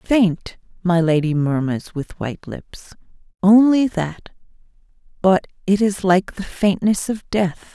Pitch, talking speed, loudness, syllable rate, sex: 185 Hz, 130 wpm, -19 LUFS, 3.8 syllables/s, female